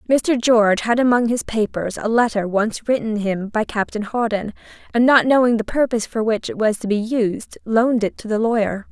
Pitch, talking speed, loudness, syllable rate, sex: 225 Hz, 210 wpm, -19 LUFS, 5.2 syllables/s, female